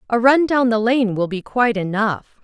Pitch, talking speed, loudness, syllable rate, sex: 230 Hz, 220 wpm, -18 LUFS, 5.3 syllables/s, female